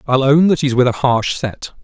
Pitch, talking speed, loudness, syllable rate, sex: 135 Hz, 260 wpm, -15 LUFS, 5.0 syllables/s, male